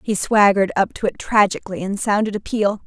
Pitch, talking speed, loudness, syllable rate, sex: 200 Hz, 210 wpm, -18 LUFS, 6.0 syllables/s, female